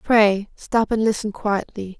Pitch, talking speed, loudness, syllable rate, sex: 210 Hz, 150 wpm, -21 LUFS, 3.8 syllables/s, female